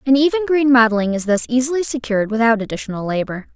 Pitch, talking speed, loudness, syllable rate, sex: 240 Hz, 185 wpm, -17 LUFS, 6.6 syllables/s, female